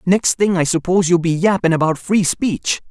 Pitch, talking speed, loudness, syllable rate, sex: 175 Hz, 205 wpm, -16 LUFS, 5.2 syllables/s, male